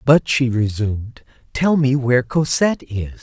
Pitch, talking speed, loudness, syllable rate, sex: 130 Hz, 150 wpm, -18 LUFS, 4.6 syllables/s, male